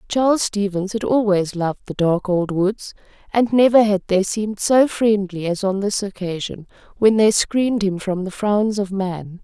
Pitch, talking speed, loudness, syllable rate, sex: 200 Hz, 185 wpm, -19 LUFS, 4.6 syllables/s, female